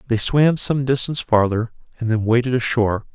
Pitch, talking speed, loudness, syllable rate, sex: 120 Hz, 170 wpm, -19 LUFS, 5.7 syllables/s, male